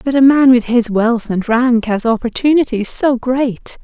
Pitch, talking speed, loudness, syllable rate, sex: 245 Hz, 190 wpm, -14 LUFS, 4.3 syllables/s, female